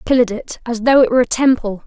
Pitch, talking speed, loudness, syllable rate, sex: 240 Hz, 255 wpm, -15 LUFS, 7.1 syllables/s, female